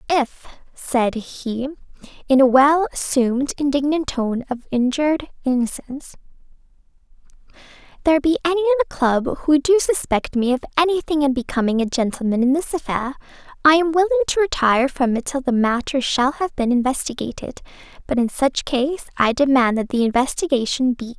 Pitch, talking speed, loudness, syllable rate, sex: 275 Hz, 155 wpm, -19 LUFS, 5.6 syllables/s, female